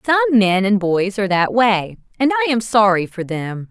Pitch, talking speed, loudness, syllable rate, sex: 215 Hz, 210 wpm, -17 LUFS, 4.8 syllables/s, female